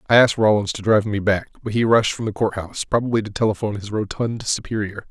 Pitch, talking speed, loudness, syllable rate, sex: 105 Hz, 225 wpm, -20 LUFS, 6.7 syllables/s, male